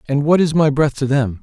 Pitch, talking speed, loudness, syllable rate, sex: 145 Hz, 295 wpm, -16 LUFS, 5.3 syllables/s, male